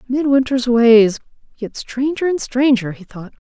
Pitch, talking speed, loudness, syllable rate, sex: 245 Hz, 140 wpm, -15 LUFS, 4.3 syllables/s, female